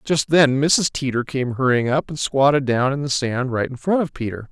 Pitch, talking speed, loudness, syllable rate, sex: 135 Hz, 240 wpm, -19 LUFS, 5.1 syllables/s, male